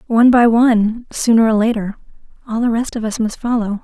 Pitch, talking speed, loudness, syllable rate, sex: 225 Hz, 205 wpm, -15 LUFS, 5.8 syllables/s, female